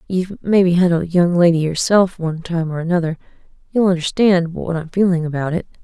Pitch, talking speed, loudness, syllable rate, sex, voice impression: 175 Hz, 175 wpm, -17 LUFS, 5.8 syllables/s, female, very feminine, adult-like, thin, slightly tensed, slightly weak, slightly dark, soft, clear, slightly fluent, slightly raspy, cute, slightly cool, intellectual, slightly refreshing, sincere, very calm, friendly, very reassuring, unique, very elegant, slightly wild, sweet, slightly lively, kind, modest, slightly light